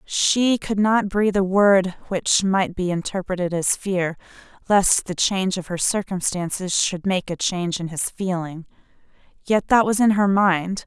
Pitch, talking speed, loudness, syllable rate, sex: 190 Hz, 170 wpm, -21 LUFS, 4.4 syllables/s, female